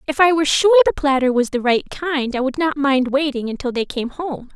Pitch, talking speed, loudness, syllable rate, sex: 280 Hz, 250 wpm, -18 LUFS, 5.7 syllables/s, female